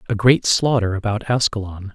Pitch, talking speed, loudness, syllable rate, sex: 110 Hz, 155 wpm, -18 LUFS, 5.1 syllables/s, male